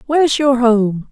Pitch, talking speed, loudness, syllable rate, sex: 250 Hz, 160 wpm, -14 LUFS, 4.3 syllables/s, female